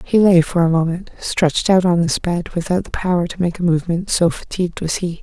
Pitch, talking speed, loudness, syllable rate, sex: 175 Hz, 240 wpm, -17 LUFS, 5.7 syllables/s, female